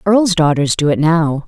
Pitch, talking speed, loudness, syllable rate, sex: 165 Hz, 205 wpm, -14 LUFS, 4.4 syllables/s, female